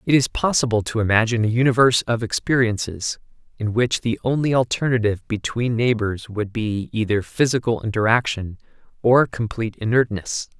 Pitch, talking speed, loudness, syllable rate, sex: 115 Hz, 135 wpm, -20 LUFS, 5.5 syllables/s, male